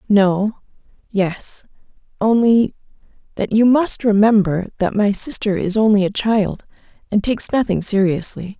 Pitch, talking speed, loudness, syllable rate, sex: 210 Hz, 105 wpm, -17 LUFS, 4.4 syllables/s, female